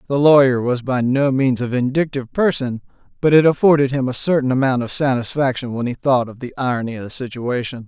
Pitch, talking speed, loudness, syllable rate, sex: 130 Hz, 205 wpm, -18 LUFS, 5.9 syllables/s, male